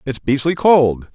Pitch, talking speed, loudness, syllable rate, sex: 135 Hz, 160 wpm, -15 LUFS, 3.9 syllables/s, male